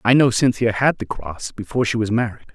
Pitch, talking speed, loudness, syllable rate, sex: 115 Hz, 235 wpm, -20 LUFS, 6.1 syllables/s, male